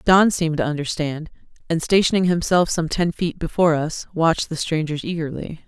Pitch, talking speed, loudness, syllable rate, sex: 165 Hz, 170 wpm, -21 LUFS, 5.5 syllables/s, female